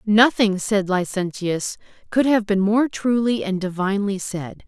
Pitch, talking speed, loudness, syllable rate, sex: 205 Hz, 140 wpm, -21 LUFS, 4.3 syllables/s, female